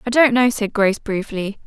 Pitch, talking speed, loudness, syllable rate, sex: 220 Hz, 215 wpm, -18 LUFS, 5.3 syllables/s, female